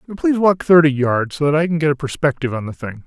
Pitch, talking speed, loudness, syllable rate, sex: 150 Hz, 275 wpm, -17 LUFS, 7.0 syllables/s, male